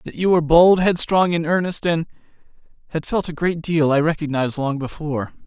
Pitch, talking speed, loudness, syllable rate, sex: 160 Hz, 185 wpm, -19 LUFS, 5.7 syllables/s, male